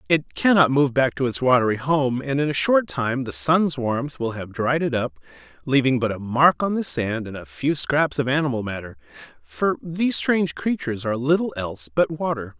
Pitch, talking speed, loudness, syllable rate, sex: 135 Hz, 210 wpm, -22 LUFS, 5.2 syllables/s, male